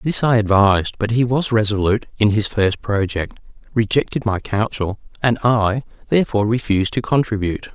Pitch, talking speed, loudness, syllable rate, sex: 110 Hz, 155 wpm, -18 LUFS, 5.5 syllables/s, male